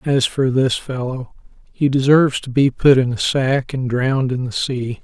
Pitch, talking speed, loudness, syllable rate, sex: 130 Hz, 200 wpm, -17 LUFS, 4.6 syllables/s, male